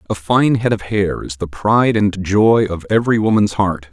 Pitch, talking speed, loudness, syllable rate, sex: 105 Hz, 215 wpm, -16 LUFS, 5.0 syllables/s, male